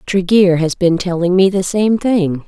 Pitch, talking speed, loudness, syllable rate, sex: 185 Hz, 195 wpm, -14 LUFS, 4.3 syllables/s, female